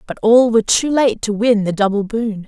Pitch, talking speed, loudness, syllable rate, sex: 220 Hz, 245 wpm, -15 LUFS, 5.2 syllables/s, female